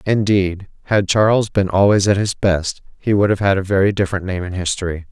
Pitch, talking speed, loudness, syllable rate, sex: 95 Hz, 210 wpm, -17 LUFS, 5.6 syllables/s, male